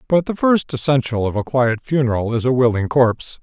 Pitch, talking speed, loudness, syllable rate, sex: 130 Hz, 210 wpm, -18 LUFS, 5.5 syllables/s, male